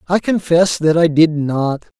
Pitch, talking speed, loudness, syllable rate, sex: 160 Hz, 180 wpm, -15 LUFS, 4.0 syllables/s, male